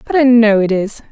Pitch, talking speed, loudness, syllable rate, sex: 225 Hz, 270 wpm, -12 LUFS, 5.3 syllables/s, female